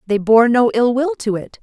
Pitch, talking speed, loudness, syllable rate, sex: 235 Hz, 260 wpm, -15 LUFS, 4.6 syllables/s, female